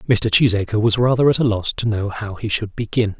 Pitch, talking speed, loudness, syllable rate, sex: 110 Hz, 245 wpm, -18 LUFS, 5.7 syllables/s, male